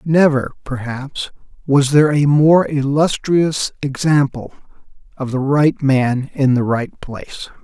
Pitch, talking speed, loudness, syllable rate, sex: 140 Hz, 125 wpm, -16 LUFS, 4.0 syllables/s, male